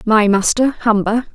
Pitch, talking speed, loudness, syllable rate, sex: 220 Hz, 135 wpm, -15 LUFS, 4.2 syllables/s, female